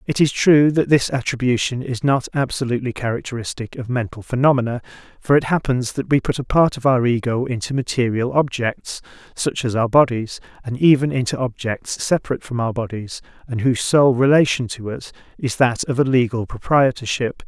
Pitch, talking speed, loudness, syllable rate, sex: 125 Hz, 175 wpm, -19 LUFS, 5.5 syllables/s, male